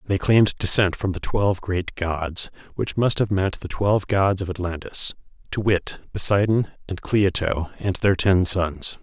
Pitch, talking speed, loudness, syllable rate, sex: 95 Hz, 175 wpm, -22 LUFS, 4.5 syllables/s, male